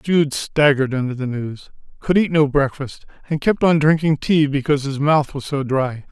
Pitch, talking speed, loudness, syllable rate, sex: 145 Hz, 195 wpm, -18 LUFS, 4.9 syllables/s, male